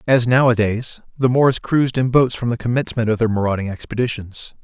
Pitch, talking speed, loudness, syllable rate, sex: 120 Hz, 180 wpm, -18 LUFS, 5.8 syllables/s, male